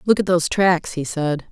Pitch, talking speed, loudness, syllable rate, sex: 170 Hz, 240 wpm, -19 LUFS, 5.1 syllables/s, female